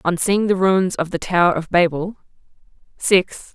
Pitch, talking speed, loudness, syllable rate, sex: 180 Hz, 170 wpm, -18 LUFS, 4.6 syllables/s, female